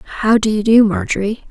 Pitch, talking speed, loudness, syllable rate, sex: 220 Hz, 200 wpm, -14 LUFS, 6.8 syllables/s, female